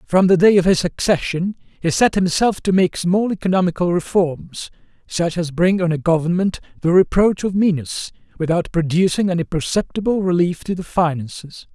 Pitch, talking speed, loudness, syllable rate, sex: 180 Hz, 165 wpm, -18 LUFS, 5.1 syllables/s, male